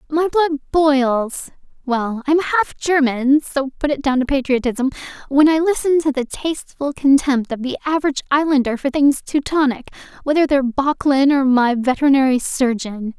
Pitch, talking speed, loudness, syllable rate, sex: 275 Hz, 145 wpm, -17 LUFS, 5.1 syllables/s, female